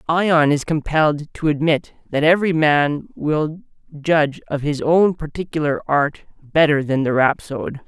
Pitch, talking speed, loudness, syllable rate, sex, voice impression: 150 Hz, 145 wpm, -19 LUFS, 4.5 syllables/s, male, very feminine, adult-like, middle-aged, slightly thin, slightly tensed, powerful, slightly bright, slightly hard, clear, slightly fluent, slightly cool, slightly intellectual, slightly sincere, calm, slightly mature, slightly friendly, slightly reassuring, very unique, slightly elegant, wild, lively, strict